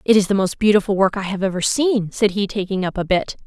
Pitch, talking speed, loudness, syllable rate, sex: 200 Hz, 275 wpm, -19 LUFS, 6.1 syllables/s, female